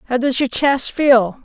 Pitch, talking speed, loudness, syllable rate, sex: 255 Hz, 210 wpm, -16 LUFS, 4.1 syllables/s, female